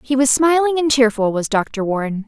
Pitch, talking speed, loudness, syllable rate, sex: 250 Hz, 210 wpm, -17 LUFS, 5.1 syllables/s, female